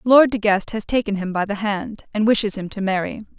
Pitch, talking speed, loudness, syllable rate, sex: 210 Hz, 250 wpm, -20 LUFS, 5.4 syllables/s, female